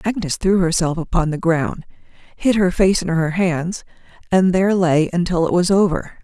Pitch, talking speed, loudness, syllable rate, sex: 175 Hz, 185 wpm, -18 LUFS, 4.9 syllables/s, female